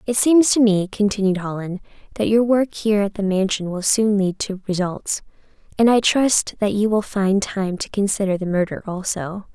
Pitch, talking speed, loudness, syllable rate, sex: 205 Hz, 195 wpm, -19 LUFS, 4.9 syllables/s, female